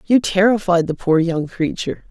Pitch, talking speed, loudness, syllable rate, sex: 185 Hz, 170 wpm, -18 LUFS, 5.2 syllables/s, female